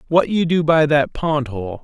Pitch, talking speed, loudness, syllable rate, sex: 150 Hz, 230 wpm, -18 LUFS, 4.3 syllables/s, male